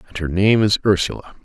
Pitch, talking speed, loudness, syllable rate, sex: 100 Hz, 210 wpm, -18 LUFS, 6.1 syllables/s, male